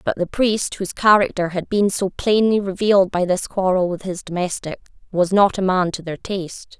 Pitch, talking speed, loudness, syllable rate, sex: 190 Hz, 205 wpm, -19 LUFS, 5.2 syllables/s, female